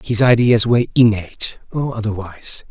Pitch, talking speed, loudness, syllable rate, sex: 110 Hz, 110 wpm, -16 LUFS, 5.1 syllables/s, male